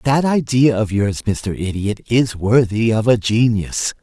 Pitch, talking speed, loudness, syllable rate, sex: 115 Hz, 165 wpm, -17 LUFS, 3.9 syllables/s, male